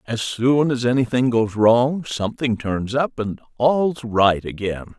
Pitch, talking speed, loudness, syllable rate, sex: 120 Hz, 155 wpm, -20 LUFS, 3.9 syllables/s, male